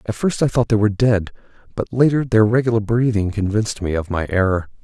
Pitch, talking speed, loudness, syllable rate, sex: 110 Hz, 210 wpm, -18 LUFS, 6.1 syllables/s, male